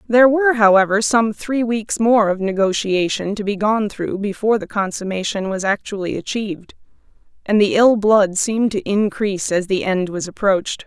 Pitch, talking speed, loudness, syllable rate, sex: 205 Hz, 170 wpm, -18 LUFS, 5.2 syllables/s, female